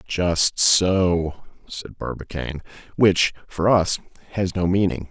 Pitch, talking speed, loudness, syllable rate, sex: 90 Hz, 120 wpm, -21 LUFS, 3.6 syllables/s, male